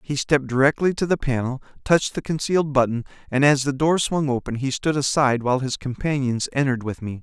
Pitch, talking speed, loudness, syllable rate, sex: 135 Hz, 210 wpm, -22 LUFS, 6.2 syllables/s, male